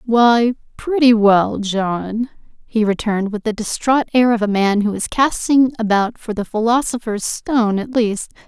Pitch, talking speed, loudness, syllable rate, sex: 225 Hz, 165 wpm, -17 LUFS, 4.4 syllables/s, female